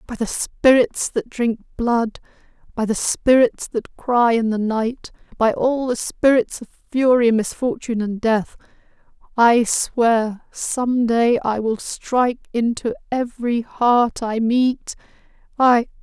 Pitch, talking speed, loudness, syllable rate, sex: 235 Hz, 125 wpm, -19 LUFS, 3.6 syllables/s, female